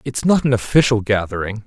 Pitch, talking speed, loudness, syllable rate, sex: 115 Hz, 180 wpm, -17 LUFS, 5.7 syllables/s, male